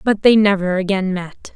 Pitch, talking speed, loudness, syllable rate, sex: 195 Hz, 195 wpm, -16 LUFS, 4.8 syllables/s, female